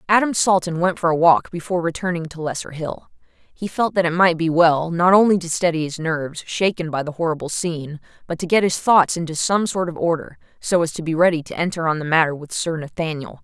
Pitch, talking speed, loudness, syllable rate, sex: 170 Hz, 230 wpm, -20 LUFS, 5.8 syllables/s, female